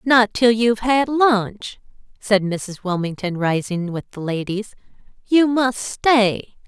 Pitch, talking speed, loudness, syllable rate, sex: 215 Hz, 135 wpm, -19 LUFS, 3.7 syllables/s, female